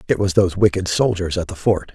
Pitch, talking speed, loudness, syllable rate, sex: 90 Hz, 245 wpm, -19 LUFS, 6.2 syllables/s, male